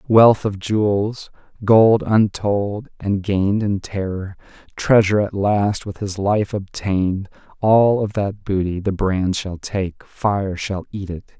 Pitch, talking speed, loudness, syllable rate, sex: 100 Hz, 145 wpm, -19 LUFS, 3.7 syllables/s, male